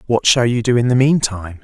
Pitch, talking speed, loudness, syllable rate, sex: 115 Hz, 255 wpm, -15 LUFS, 6.1 syllables/s, male